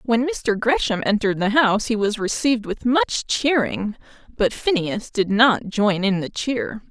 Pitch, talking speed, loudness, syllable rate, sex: 225 Hz, 175 wpm, -20 LUFS, 4.4 syllables/s, female